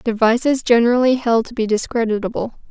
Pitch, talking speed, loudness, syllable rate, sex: 235 Hz, 135 wpm, -17 LUFS, 5.9 syllables/s, female